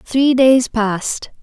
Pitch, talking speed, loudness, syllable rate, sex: 245 Hz, 125 wpm, -15 LUFS, 3.2 syllables/s, female